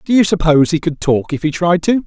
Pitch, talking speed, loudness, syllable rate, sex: 170 Hz, 290 wpm, -14 LUFS, 6.1 syllables/s, male